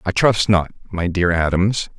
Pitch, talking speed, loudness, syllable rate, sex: 95 Hz, 180 wpm, -18 LUFS, 4.4 syllables/s, male